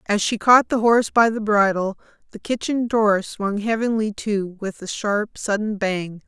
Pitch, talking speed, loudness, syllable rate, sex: 210 Hz, 180 wpm, -20 LUFS, 4.4 syllables/s, female